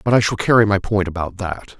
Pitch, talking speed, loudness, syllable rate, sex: 100 Hz, 265 wpm, -18 LUFS, 5.9 syllables/s, male